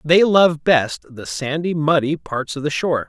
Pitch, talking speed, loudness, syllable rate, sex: 150 Hz, 195 wpm, -18 LUFS, 4.4 syllables/s, male